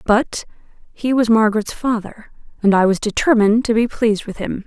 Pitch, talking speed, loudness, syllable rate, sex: 220 Hz, 180 wpm, -17 LUFS, 5.6 syllables/s, female